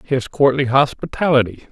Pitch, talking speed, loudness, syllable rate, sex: 135 Hz, 105 wpm, -17 LUFS, 5.0 syllables/s, male